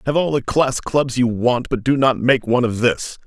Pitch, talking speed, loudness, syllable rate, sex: 125 Hz, 255 wpm, -18 LUFS, 5.0 syllables/s, male